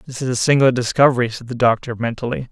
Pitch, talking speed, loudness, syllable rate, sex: 125 Hz, 215 wpm, -18 LUFS, 7.2 syllables/s, male